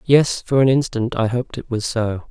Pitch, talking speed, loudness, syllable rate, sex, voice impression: 120 Hz, 235 wpm, -19 LUFS, 5.2 syllables/s, male, masculine, adult-like, slightly dark, refreshing, sincere, slightly kind